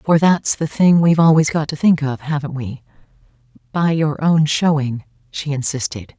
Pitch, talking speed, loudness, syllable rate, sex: 150 Hz, 155 wpm, -17 LUFS, 4.8 syllables/s, female